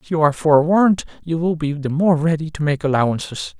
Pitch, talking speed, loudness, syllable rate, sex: 155 Hz, 215 wpm, -18 LUFS, 6.2 syllables/s, male